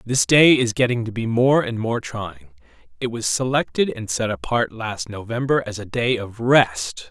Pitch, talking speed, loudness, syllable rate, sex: 115 Hz, 195 wpm, -20 LUFS, 4.4 syllables/s, male